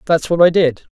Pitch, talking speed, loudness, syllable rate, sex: 165 Hz, 250 wpm, -14 LUFS, 5.6 syllables/s, male